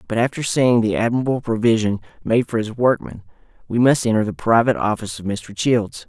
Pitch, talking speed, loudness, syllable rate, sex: 115 Hz, 190 wpm, -19 LUFS, 5.9 syllables/s, male